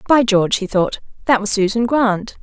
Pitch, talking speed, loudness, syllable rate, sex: 215 Hz, 200 wpm, -17 LUFS, 5.2 syllables/s, female